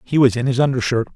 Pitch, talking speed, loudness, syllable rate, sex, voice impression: 125 Hz, 260 wpm, -18 LUFS, 7.0 syllables/s, male, masculine, middle-aged, tensed, powerful, slightly raspy, intellectual, slightly mature, wild, slightly sharp